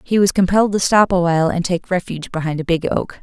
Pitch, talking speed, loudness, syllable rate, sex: 180 Hz, 260 wpm, -17 LUFS, 6.4 syllables/s, female